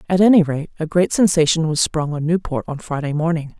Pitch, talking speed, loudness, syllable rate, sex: 160 Hz, 215 wpm, -18 LUFS, 5.7 syllables/s, female